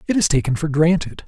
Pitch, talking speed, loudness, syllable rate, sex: 150 Hz, 235 wpm, -18 LUFS, 6.3 syllables/s, male